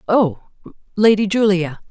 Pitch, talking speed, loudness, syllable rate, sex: 190 Hz, 95 wpm, -16 LUFS, 4.5 syllables/s, female